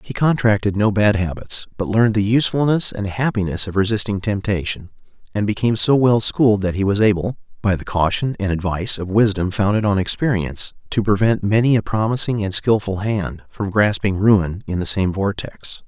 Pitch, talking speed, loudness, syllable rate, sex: 105 Hz, 180 wpm, -19 LUFS, 5.4 syllables/s, male